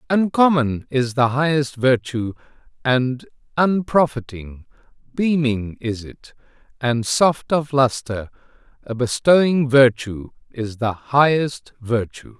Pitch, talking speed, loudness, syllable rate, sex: 130 Hz, 100 wpm, -19 LUFS, 3.6 syllables/s, male